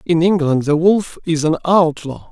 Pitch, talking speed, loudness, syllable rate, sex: 165 Hz, 180 wpm, -15 LUFS, 4.4 syllables/s, male